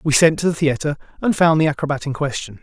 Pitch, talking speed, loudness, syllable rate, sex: 150 Hz, 250 wpm, -18 LUFS, 6.6 syllables/s, male